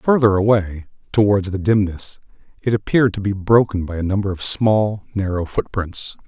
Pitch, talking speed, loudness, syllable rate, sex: 100 Hz, 165 wpm, -19 LUFS, 5.0 syllables/s, male